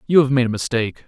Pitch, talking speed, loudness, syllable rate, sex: 130 Hz, 280 wpm, -19 LUFS, 7.7 syllables/s, male